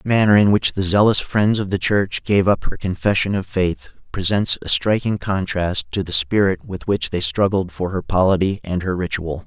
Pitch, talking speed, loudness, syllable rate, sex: 95 Hz, 215 wpm, -19 LUFS, 5.2 syllables/s, male